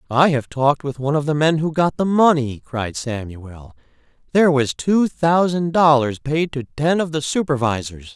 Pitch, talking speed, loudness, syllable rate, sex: 140 Hz, 185 wpm, -19 LUFS, 4.8 syllables/s, male